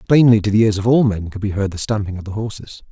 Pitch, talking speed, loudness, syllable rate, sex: 105 Hz, 310 wpm, -17 LUFS, 6.7 syllables/s, male